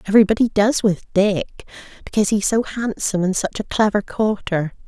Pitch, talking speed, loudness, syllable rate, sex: 205 Hz, 160 wpm, -19 LUFS, 5.5 syllables/s, female